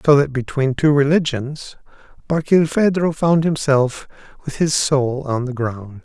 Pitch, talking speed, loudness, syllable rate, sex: 140 Hz, 140 wpm, -18 LUFS, 4.2 syllables/s, male